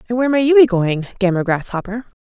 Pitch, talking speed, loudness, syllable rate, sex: 215 Hz, 215 wpm, -16 LUFS, 6.7 syllables/s, female